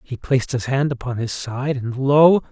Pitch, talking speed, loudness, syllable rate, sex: 130 Hz, 215 wpm, -20 LUFS, 4.7 syllables/s, male